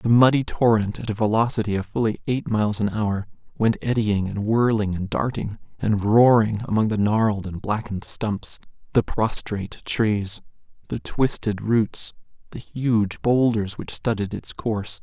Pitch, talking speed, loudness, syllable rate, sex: 110 Hz, 155 wpm, -23 LUFS, 4.6 syllables/s, male